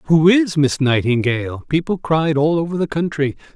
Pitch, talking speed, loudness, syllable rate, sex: 150 Hz, 170 wpm, -17 LUFS, 4.8 syllables/s, male